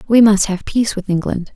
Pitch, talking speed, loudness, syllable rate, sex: 205 Hz, 230 wpm, -16 LUFS, 5.8 syllables/s, female